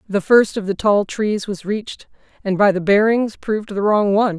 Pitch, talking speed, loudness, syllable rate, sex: 205 Hz, 220 wpm, -18 LUFS, 5.1 syllables/s, female